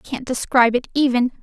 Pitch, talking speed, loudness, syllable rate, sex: 250 Hz, 210 wpm, -18 LUFS, 7.0 syllables/s, female